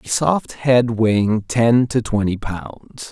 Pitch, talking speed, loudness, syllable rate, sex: 115 Hz, 155 wpm, -18 LUFS, 3.3 syllables/s, male